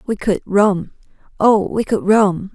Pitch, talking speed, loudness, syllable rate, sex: 205 Hz, 165 wpm, -16 LUFS, 3.7 syllables/s, female